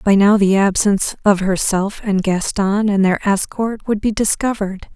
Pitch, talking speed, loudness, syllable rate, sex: 200 Hz, 170 wpm, -16 LUFS, 4.7 syllables/s, female